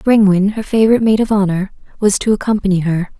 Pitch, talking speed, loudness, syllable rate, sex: 205 Hz, 190 wpm, -14 LUFS, 6.4 syllables/s, female